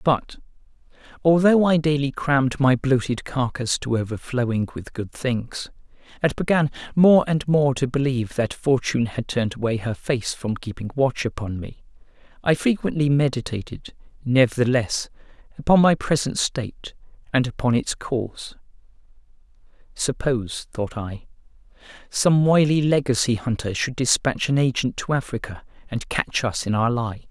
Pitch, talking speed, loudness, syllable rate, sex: 130 Hz, 140 wpm, -22 LUFS, 4.8 syllables/s, male